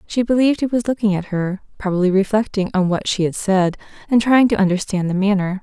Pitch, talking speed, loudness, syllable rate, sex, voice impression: 200 Hz, 215 wpm, -18 LUFS, 6.0 syllables/s, female, very feminine, slightly young, slightly adult-like, thin, slightly tensed, weak, slightly bright, slightly hard, slightly clear, very fluent, slightly raspy, slightly cute, slightly cool, very intellectual, refreshing, sincere, very calm, very friendly, very reassuring, slightly unique, elegant, sweet, slightly lively, kind, modest